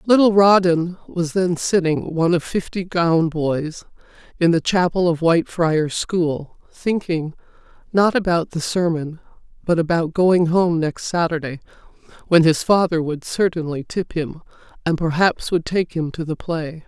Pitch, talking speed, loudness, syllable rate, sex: 170 Hz, 150 wpm, -19 LUFS, 4.3 syllables/s, female